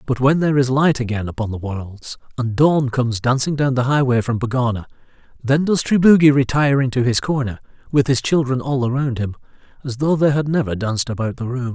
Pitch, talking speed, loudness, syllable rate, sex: 130 Hz, 205 wpm, -18 LUFS, 5.8 syllables/s, male